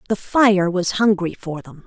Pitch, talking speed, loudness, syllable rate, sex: 190 Hz, 195 wpm, -18 LUFS, 4.2 syllables/s, female